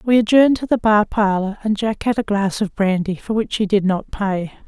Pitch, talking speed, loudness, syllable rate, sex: 205 Hz, 245 wpm, -18 LUFS, 5.2 syllables/s, female